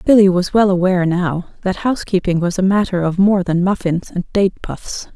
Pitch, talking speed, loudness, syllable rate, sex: 185 Hz, 200 wpm, -16 LUFS, 5.2 syllables/s, female